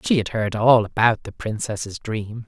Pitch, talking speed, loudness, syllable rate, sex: 110 Hz, 195 wpm, -21 LUFS, 4.3 syllables/s, male